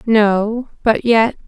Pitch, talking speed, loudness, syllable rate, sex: 220 Hz, 120 wpm, -15 LUFS, 2.6 syllables/s, female